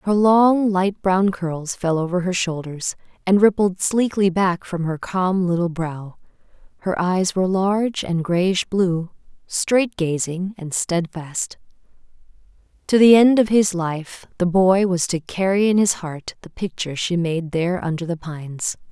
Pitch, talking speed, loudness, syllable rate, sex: 180 Hz, 160 wpm, -20 LUFS, 4.2 syllables/s, female